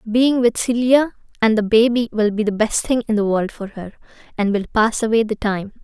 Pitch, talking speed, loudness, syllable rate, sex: 220 Hz, 225 wpm, -18 LUFS, 5.2 syllables/s, female